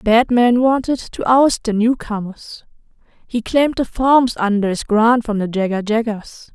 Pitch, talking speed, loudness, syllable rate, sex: 230 Hz, 155 wpm, -16 LUFS, 4.3 syllables/s, female